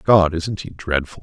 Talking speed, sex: 195 wpm, male